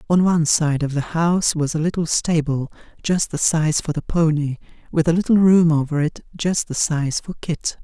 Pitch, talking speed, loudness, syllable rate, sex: 160 Hz, 205 wpm, -19 LUFS, 5.0 syllables/s, male